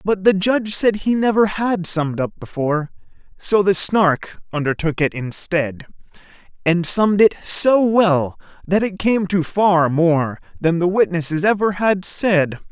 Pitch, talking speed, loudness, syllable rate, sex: 180 Hz, 155 wpm, -18 LUFS, 4.2 syllables/s, male